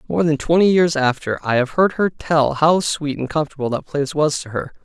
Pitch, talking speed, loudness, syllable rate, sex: 150 Hz, 235 wpm, -18 LUFS, 5.5 syllables/s, male